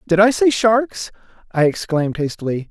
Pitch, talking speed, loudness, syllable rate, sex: 190 Hz, 155 wpm, -17 LUFS, 5.1 syllables/s, male